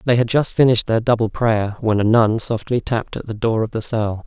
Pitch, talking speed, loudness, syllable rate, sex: 115 Hz, 255 wpm, -18 LUFS, 5.6 syllables/s, male